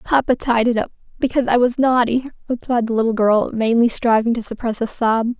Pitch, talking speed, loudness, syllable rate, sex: 235 Hz, 200 wpm, -18 LUFS, 5.6 syllables/s, female